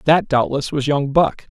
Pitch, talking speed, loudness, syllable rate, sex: 145 Hz, 190 wpm, -18 LUFS, 4.4 syllables/s, male